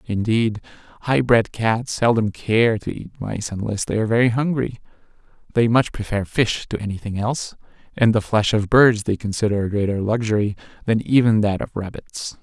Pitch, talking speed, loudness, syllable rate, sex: 110 Hz, 175 wpm, -20 LUFS, 5.1 syllables/s, male